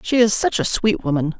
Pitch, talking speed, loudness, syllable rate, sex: 205 Hz, 260 wpm, -18 LUFS, 5.5 syllables/s, female